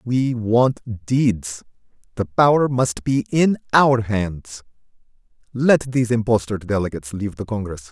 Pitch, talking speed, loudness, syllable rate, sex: 115 Hz, 120 wpm, -19 LUFS, 4.2 syllables/s, male